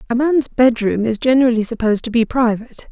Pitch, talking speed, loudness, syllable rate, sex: 240 Hz, 185 wpm, -16 LUFS, 6.3 syllables/s, female